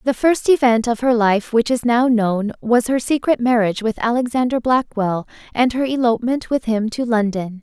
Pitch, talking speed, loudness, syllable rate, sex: 235 Hz, 190 wpm, -18 LUFS, 5.0 syllables/s, female